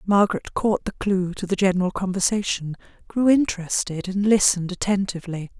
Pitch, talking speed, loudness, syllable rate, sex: 190 Hz, 140 wpm, -22 LUFS, 5.7 syllables/s, female